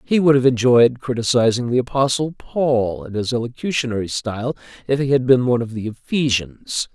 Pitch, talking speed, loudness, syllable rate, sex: 125 Hz, 175 wpm, -19 LUFS, 5.4 syllables/s, male